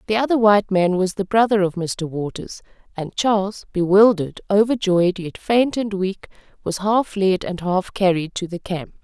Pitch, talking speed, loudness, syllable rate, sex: 195 Hz, 180 wpm, -19 LUFS, 4.8 syllables/s, female